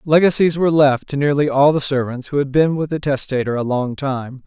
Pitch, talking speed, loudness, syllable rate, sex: 140 Hz, 230 wpm, -17 LUFS, 5.5 syllables/s, male